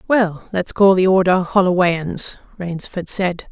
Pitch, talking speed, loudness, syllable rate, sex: 185 Hz, 135 wpm, -17 LUFS, 3.9 syllables/s, female